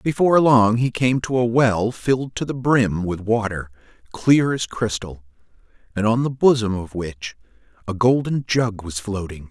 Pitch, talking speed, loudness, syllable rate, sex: 115 Hz, 170 wpm, -20 LUFS, 4.5 syllables/s, male